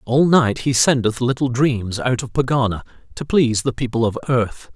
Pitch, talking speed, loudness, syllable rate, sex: 125 Hz, 190 wpm, -18 LUFS, 5.0 syllables/s, male